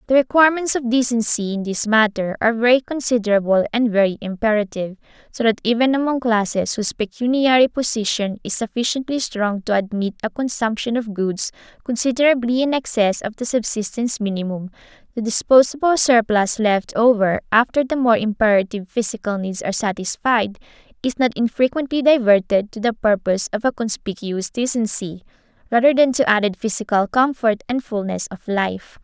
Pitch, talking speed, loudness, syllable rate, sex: 225 Hz, 145 wpm, -19 LUFS, 5.5 syllables/s, female